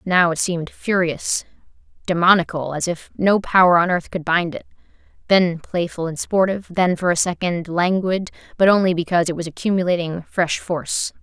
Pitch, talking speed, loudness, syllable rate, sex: 175 Hz, 165 wpm, -19 LUFS, 5.3 syllables/s, female